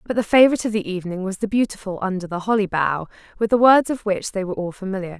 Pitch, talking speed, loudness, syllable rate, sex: 200 Hz, 255 wpm, -20 LUFS, 7.2 syllables/s, female